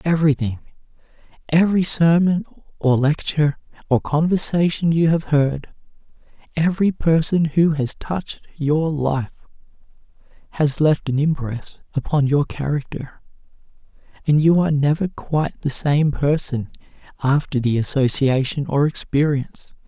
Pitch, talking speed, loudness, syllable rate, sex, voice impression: 150 Hz, 105 wpm, -19 LUFS, 4.7 syllables/s, male, masculine, adult-like, slightly relaxed, slightly weak, soft, intellectual, reassuring, kind, modest